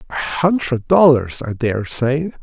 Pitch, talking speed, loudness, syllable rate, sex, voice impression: 140 Hz, 150 wpm, -17 LUFS, 3.7 syllables/s, male, very masculine, very adult-like, old, very thick, slightly relaxed, slightly weak, slightly dark, soft, slightly muffled, slightly halting, slightly cool, intellectual, sincere, very calm, very mature, friendly, reassuring, elegant, slightly lively, kind, slightly modest